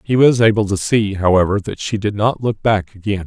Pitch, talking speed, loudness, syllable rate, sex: 105 Hz, 240 wpm, -16 LUFS, 5.4 syllables/s, male